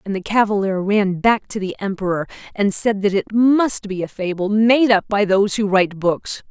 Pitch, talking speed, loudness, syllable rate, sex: 205 Hz, 210 wpm, -18 LUFS, 5.0 syllables/s, female